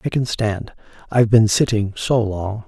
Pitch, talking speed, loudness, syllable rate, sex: 110 Hz, 180 wpm, -18 LUFS, 4.6 syllables/s, male